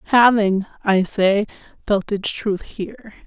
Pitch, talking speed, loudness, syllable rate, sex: 205 Hz, 130 wpm, -19 LUFS, 3.8 syllables/s, female